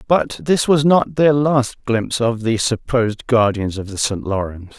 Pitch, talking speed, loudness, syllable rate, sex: 120 Hz, 190 wpm, -18 LUFS, 4.7 syllables/s, male